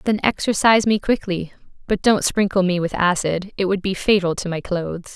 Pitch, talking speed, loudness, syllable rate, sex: 190 Hz, 200 wpm, -20 LUFS, 5.4 syllables/s, female